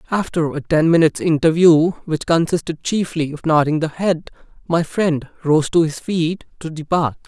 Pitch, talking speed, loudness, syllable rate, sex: 160 Hz, 165 wpm, -18 LUFS, 4.8 syllables/s, male